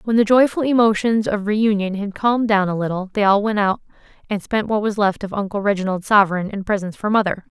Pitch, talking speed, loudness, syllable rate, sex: 205 Hz, 220 wpm, -19 LUFS, 6.0 syllables/s, female